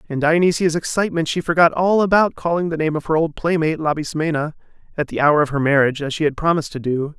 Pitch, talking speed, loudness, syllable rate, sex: 160 Hz, 225 wpm, -18 LUFS, 6.7 syllables/s, male